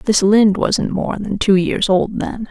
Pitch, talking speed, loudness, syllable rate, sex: 200 Hz, 215 wpm, -16 LUFS, 4.1 syllables/s, female